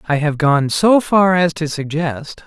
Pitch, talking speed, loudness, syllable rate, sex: 160 Hz, 195 wpm, -15 LUFS, 3.9 syllables/s, male